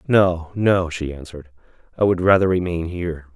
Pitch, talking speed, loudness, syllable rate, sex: 85 Hz, 160 wpm, -20 LUFS, 5.2 syllables/s, male